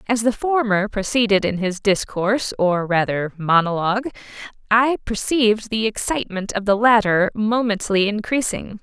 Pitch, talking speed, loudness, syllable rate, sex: 210 Hz, 130 wpm, -19 LUFS, 4.8 syllables/s, female